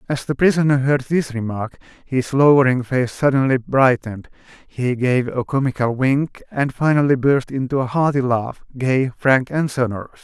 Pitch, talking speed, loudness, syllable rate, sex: 130 Hz, 160 wpm, -18 LUFS, 4.9 syllables/s, male